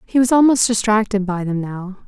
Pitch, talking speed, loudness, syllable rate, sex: 210 Hz, 200 wpm, -17 LUFS, 5.2 syllables/s, female